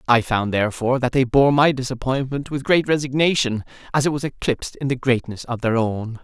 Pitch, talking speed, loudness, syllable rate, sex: 130 Hz, 200 wpm, -20 LUFS, 5.7 syllables/s, male